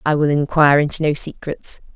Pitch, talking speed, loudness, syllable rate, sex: 150 Hz, 185 wpm, -17 LUFS, 5.8 syllables/s, female